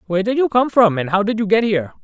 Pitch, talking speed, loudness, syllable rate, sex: 205 Hz, 325 wpm, -17 LUFS, 7.2 syllables/s, male